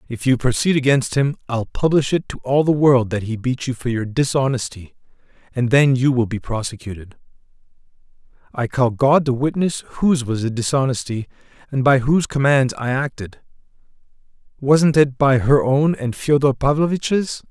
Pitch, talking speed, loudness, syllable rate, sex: 130 Hz, 165 wpm, -18 LUFS, 5.0 syllables/s, male